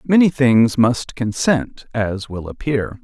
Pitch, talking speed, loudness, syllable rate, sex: 120 Hz, 140 wpm, -18 LUFS, 3.5 syllables/s, male